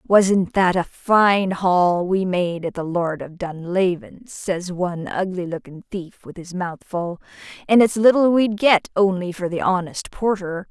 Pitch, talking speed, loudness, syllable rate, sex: 185 Hz, 175 wpm, -20 LUFS, 4.0 syllables/s, female